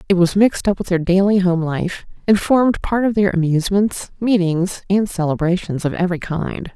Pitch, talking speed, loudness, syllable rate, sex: 185 Hz, 185 wpm, -18 LUFS, 5.3 syllables/s, female